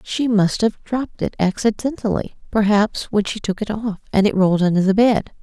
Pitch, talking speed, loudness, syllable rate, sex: 205 Hz, 200 wpm, -19 LUFS, 5.2 syllables/s, female